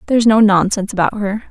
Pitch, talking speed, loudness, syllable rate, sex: 205 Hz, 240 wpm, -14 LUFS, 7.8 syllables/s, female